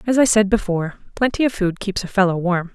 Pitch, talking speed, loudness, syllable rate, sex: 200 Hz, 240 wpm, -19 LUFS, 6.1 syllables/s, female